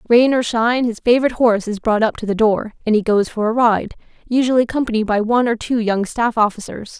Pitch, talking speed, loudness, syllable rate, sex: 225 Hz, 230 wpm, -17 LUFS, 6.4 syllables/s, female